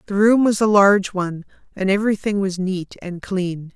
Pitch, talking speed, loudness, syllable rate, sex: 195 Hz, 190 wpm, -19 LUFS, 5.3 syllables/s, female